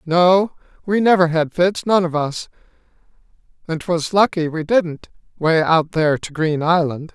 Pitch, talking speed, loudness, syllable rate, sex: 170 Hz, 160 wpm, -18 LUFS, 4.3 syllables/s, male